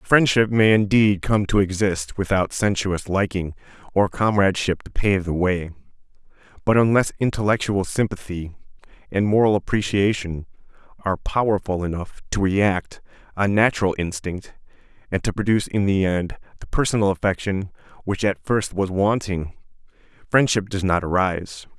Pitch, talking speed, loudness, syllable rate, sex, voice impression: 100 Hz, 130 wpm, -21 LUFS, 5.0 syllables/s, male, very masculine, very adult-like, thick, slightly tensed, slightly powerful, slightly bright, soft, clear, fluent, cool, very intellectual, slightly refreshing, very sincere, very calm, very mature, friendly, reassuring, unique, elegant, wild, sweet, lively, slightly strict, slightly intense